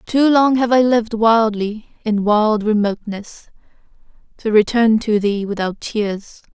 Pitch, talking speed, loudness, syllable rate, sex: 220 Hz, 135 wpm, -17 LUFS, 4.1 syllables/s, female